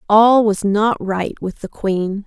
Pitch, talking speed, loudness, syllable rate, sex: 205 Hz, 185 wpm, -17 LUFS, 3.4 syllables/s, female